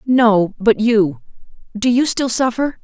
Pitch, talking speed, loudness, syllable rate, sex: 230 Hz, 150 wpm, -16 LUFS, 3.7 syllables/s, female